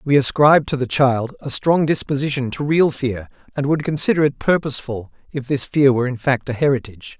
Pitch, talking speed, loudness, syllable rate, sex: 135 Hz, 200 wpm, -18 LUFS, 5.8 syllables/s, male